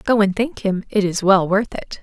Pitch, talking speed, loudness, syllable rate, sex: 200 Hz, 265 wpm, -18 LUFS, 4.6 syllables/s, female